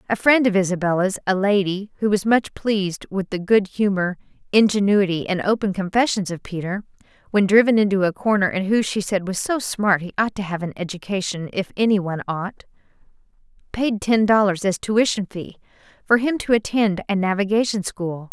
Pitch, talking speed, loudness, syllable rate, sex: 200 Hz, 175 wpm, -20 LUFS, 5.4 syllables/s, female